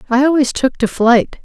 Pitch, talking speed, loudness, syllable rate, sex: 255 Hz, 210 wpm, -14 LUFS, 5.1 syllables/s, female